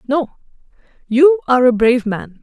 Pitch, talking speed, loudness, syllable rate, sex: 255 Hz, 150 wpm, -14 LUFS, 5.5 syllables/s, female